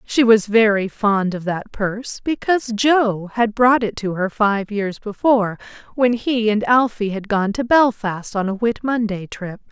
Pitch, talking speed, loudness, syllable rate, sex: 215 Hz, 185 wpm, -18 LUFS, 4.3 syllables/s, female